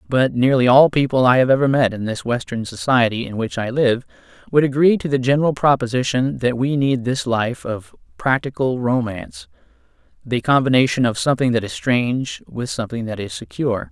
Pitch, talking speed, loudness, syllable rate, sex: 125 Hz, 180 wpm, -18 LUFS, 5.5 syllables/s, male